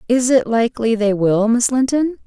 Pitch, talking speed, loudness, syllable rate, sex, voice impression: 235 Hz, 185 wpm, -16 LUFS, 5.0 syllables/s, female, feminine, adult-like, tensed, powerful, bright, slightly soft, slightly intellectual, slightly friendly, elegant, lively